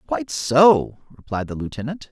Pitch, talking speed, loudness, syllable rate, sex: 125 Hz, 140 wpm, -20 LUFS, 4.9 syllables/s, male